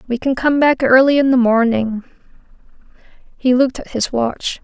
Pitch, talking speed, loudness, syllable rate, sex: 250 Hz, 170 wpm, -15 LUFS, 5.0 syllables/s, female